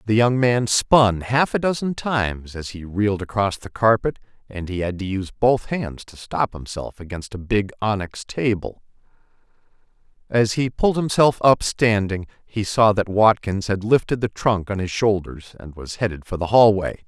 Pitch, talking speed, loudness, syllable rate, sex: 105 Hz, 185 wpm, -21 LUFS, 4.8 syllables/s, male